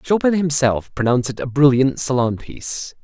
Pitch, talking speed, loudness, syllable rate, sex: 135 Hz, 160 wpm, -18 LUFS, 5.2 syllables/s, male